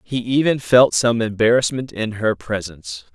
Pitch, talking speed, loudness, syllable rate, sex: 115 Hz, 155 wpm, -18 LUFS, 4.7 syllables/s, male